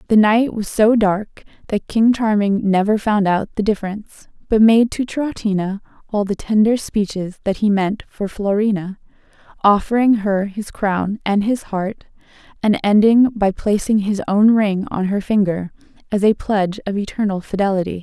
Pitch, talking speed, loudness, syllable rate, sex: 205 Hz, 165 wpm, -18 LUFS, 4.7 syllables/s, female